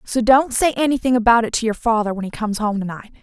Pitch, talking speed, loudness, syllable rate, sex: 230 Hz, 280 wpm, -18 LUFS, 6.6 syllables/s, female